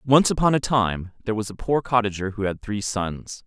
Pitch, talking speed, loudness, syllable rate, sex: 110 Hz, 225 wpm, -23 LUFS, 5.2 syllables/s, male